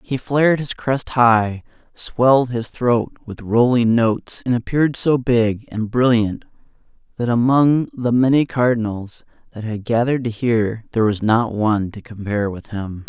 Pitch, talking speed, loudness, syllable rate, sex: 115 Hz, 160 wpm, -18 LUFS, 4.6 syllables/s, male